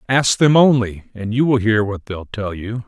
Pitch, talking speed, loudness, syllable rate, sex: 115 Hz, 230 wpm, -17 LUFS, 4.6 syllables/s, male